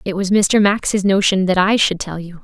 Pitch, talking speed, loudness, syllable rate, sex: 195 Hz, 245 wpm, -15 LUFS, 4.7 syllables/s, female